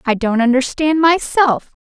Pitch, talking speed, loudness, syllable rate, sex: 275 Hz, 130 wpm, -15 LUFS, 4.3 syllables/s, female